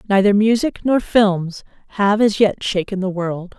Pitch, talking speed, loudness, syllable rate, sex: 200 Hz, 165 wpm, -17 LUFS, 4.2 syllables/s, female